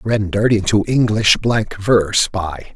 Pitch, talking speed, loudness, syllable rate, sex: 105 Hz, 130 wpm, -16 LUFS, 4.3 syllables/s, male